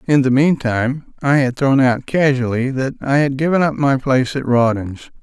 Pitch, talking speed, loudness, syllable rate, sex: 135 Hz, 195 wpm, -16 LUFS, 5.0 syllables/s, male